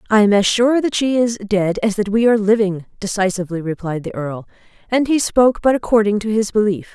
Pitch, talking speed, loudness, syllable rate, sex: 210 Hz, 215 wpm, -17 LUFS, 5.9 syllables/s, female